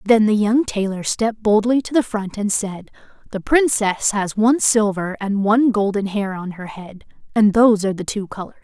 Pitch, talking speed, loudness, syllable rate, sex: 210 Hz, 200 wpm, -18 LUFS, 5.1 syllables/s, female